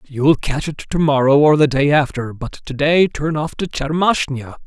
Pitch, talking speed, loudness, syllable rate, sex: 145 Hz, 205 wpm, -17 LUFS, 4.6 syllables/s, male